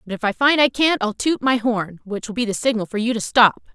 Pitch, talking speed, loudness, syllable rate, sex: 230 Hz, 305 wpm, -19 LUFS, 5.7 syllables/s, female